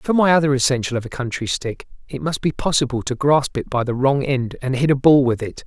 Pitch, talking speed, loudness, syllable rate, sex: 135 Hz, 275 wpm, -19 LUFS, 6.0 syllables/s, male